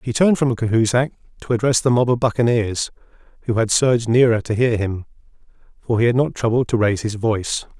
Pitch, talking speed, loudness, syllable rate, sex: 115 Hz, 200 wpm, -19 LUFS, 6.1 syllables/s, male